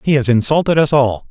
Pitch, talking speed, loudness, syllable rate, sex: 135 Hz, 230 wpm, -14 LUFS, 5.8 syllables/s, male